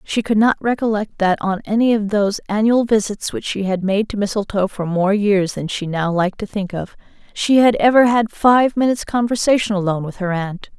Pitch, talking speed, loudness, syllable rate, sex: 210 Hz, 210 wpm, -18 LUFS, 5.4 syllables/s, female